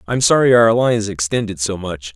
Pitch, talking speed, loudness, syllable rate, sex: 105 Hz, 225 wpm, -16 LUFS, 5.5 syllables/s, male